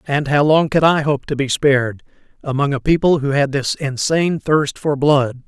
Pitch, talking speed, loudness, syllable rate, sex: 145 Hz, 210 wpm, -17 LUFS, 4.9 syllables/s, male